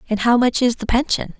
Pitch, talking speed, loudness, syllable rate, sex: 235 Hz, 260 wpm, -18 LUFS, 5.8 syllables/s, female